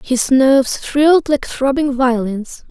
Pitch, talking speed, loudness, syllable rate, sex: 265 Hz, 135 wpm, -15 LUFS, 3.9 syllables/s, female